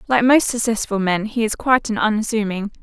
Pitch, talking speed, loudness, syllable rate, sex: 220 Hz, 190 wpm, -18 LUFS, 5.4 syllables/s, female